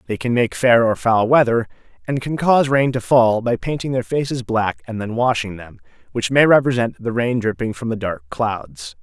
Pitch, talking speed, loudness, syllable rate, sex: 115 Hz, 215 wpm, -18 LUFS, 5.0 syllables/s, male